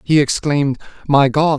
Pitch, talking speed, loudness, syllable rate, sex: 145 Hz, 150 wpm, -16 LUFS, 4.8 syllables/s, male